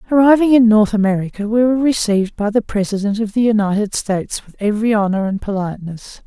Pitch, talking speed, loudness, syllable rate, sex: 215 Hz, 180 wpm, -16 LUFS, 6.3 syllables/s, female